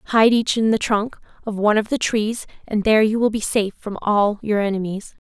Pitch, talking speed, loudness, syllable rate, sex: 215 Hz, 230 wpm, -20 LUFS, 5.4 syllables/s, female